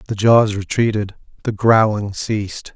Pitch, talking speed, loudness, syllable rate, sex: 105 Hz, 130 wpm, -17 LUFS, 4.4 syllables/s, male